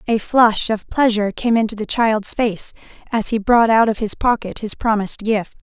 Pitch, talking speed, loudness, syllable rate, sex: 220 Hz, 200 wpm, -18 LUFS, 5.0 syllables/s, female